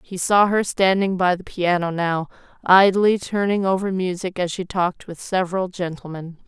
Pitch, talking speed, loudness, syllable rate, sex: 185 Hz, 165 wpm, -20 LUFS, 4.9 syllables/s, female